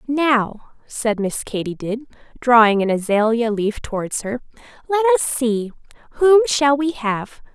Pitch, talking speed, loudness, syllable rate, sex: 245 Hz, 135 wpm, -18 LUFS, 4.0 syllables/s, female